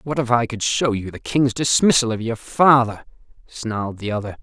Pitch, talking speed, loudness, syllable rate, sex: 120 Hz, 205 wpm, -19 LUFS, 5.1 syllables/s, male